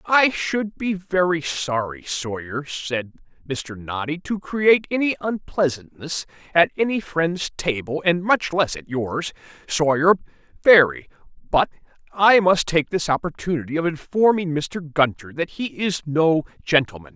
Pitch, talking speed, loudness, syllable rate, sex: 165 Hz, 135 wpm, -21 LUFS, 4.2 syllables/s, male